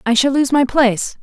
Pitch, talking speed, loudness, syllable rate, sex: 260 Hz, 245 wpm, -15 LUFS, 5.5 syllables/s, female